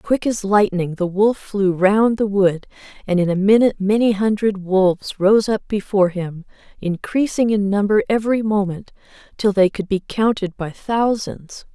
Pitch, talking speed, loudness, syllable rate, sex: 200 Hz, 165 wpm, -18 LUFS, 4.6 syllables/s, female